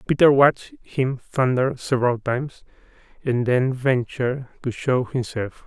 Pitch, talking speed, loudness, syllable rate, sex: 130 Hz, 125 wpm, -22 LUFS, 4.5 syllables/s, male